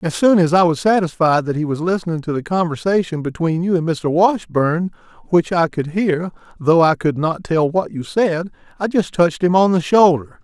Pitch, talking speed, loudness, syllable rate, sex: 170 Hz, 215 wpm, -17 LUFS, 5.1 syllables/s, male